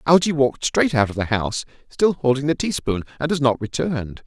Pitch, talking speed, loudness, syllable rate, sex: 135 Hz, 210 wpm, -21 LUFS, 5.9 syllables/s, male